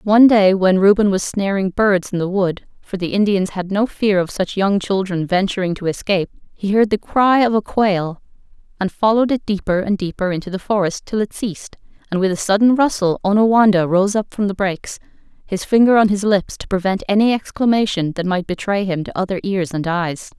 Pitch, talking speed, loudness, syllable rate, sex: 195 Hz, 205 wpm, -17 LUFS, 5.6 syllables/s, female